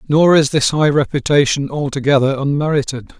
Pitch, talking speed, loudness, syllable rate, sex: 140 Hz, 130 wpm, -15 LUFS, 5.5 syllables/s, male